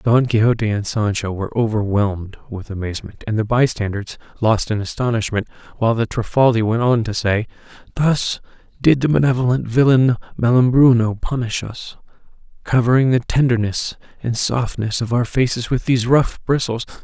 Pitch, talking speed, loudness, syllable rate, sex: 115 Hz, 145 wpm, -18 LUFS, 5.3 syllables/s, male